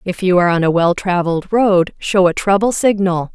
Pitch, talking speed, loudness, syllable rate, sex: 185 Hz, 215 wpm, -15 LUFS, 5.3 syllables/s, female